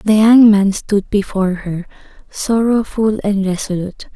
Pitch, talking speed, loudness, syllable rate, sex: 205 Hz, 130 wpm, -14 LUFS, 4.4 syllables/s, female